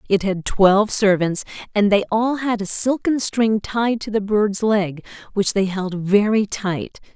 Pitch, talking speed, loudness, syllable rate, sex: 205 Hz, 175 wpm, -19 LUFS, 4.1 syllables/s, female